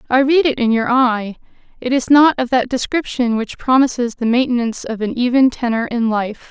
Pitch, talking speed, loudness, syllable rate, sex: 245 Hz, 205 wpm, -16 LUFS, 5.3 syllables/s, female